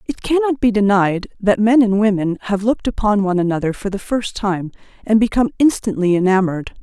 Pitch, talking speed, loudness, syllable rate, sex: 205 Hz, 185 wpm, -17 LUFS, 6.0 syllables/s, female